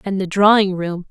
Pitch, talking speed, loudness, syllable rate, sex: 190 Hz, 215 wpm, -16 LUFS, 5.0 syllables/s, female